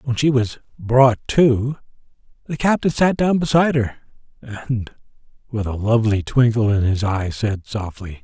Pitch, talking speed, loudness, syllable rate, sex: 120 Hz, 155 wpm, -19 LUFS, 4.8 syllables/s, male